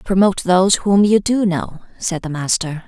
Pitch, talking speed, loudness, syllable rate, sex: 185 Hz, 190 wpm, -16 LUFS, 5.1 syllables/s, female